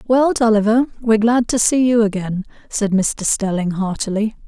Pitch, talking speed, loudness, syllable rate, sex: 220 Hz, 160 wpm, -17 LUFS, 4.9 syllables/s, female